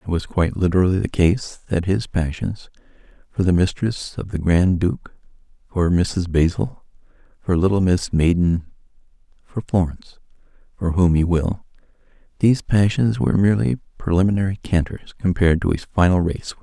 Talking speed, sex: 150 wpm, male